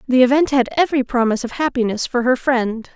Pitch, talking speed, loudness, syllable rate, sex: 250 Hz, 205 wpm, -17 LUFS, 6.1 syllables/s, female